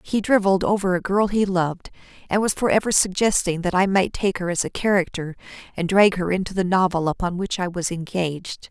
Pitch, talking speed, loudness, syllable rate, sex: 185 Hz, 205 wpm, -21 LUFS, 5.7 syllables/s, female